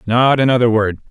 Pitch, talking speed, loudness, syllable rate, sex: 120 Hz, 160 wpm, -14 LUFS, 5.7 syllables/s, male